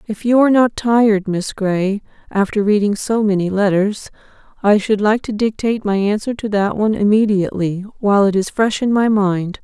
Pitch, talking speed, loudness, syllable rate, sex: 210 Hz, 185 wpm, -16 LUFS, 5.3 syllables/s, female